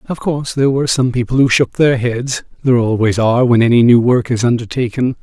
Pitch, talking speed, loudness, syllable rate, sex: 125 Hz, 220 wpm, -14 LUFS, 6.2 syllables/s, male